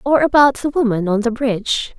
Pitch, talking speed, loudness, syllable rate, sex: 245 Hz, 210 wpm, -16 LUFS, 5.4 syllables/s, female